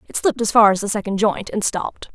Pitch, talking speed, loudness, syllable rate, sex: 210 Hz, 280 wpm, -18 LUFS, 6.5 syllables/s, female